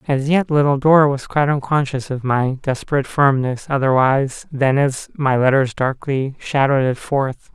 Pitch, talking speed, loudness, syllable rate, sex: 135 Hz, 160 wpm, -18 LUFS, 5.0 syllables/s, male